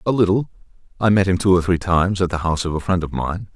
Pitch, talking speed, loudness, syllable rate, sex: 90 Hz, 285 wpm, -19 LUFS, 6.9 syllables/s, male